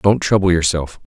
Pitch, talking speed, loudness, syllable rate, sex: 90 Hz, 150 wpm, -16 LUFS, 5.1 syllables/s, male